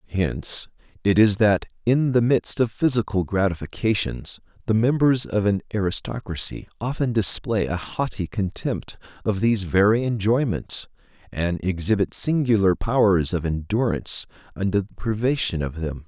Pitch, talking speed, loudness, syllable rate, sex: 105 Hz, 130 wpm, -22 LUFS, 4.8 syllables/s, male